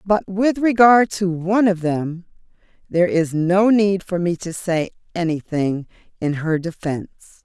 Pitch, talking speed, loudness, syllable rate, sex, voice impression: 180 Hz, 155 wpm, -19 LUFS, 4.4 syllables/s, female, feminine, middle-aged, tensed, powerful, slightly halting, slightly raspy, intellectual, slightly friendly, unique, slightly wild, lively, strict, intense